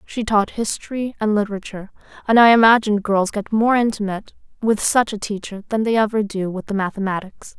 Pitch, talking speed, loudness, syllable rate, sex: 210 Hz, 180 wpm, -19 LUFS, 5.9 syllables/s, female